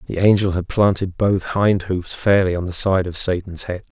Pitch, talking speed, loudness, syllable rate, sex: 95 Hz, 210 wpm, -19 LUFS, 4.9 syllables/s, male